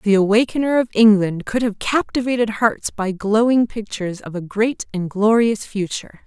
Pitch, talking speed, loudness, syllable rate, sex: 215 Hz, 165 wpm, -19 LUFS, 4.9 syllables/s, female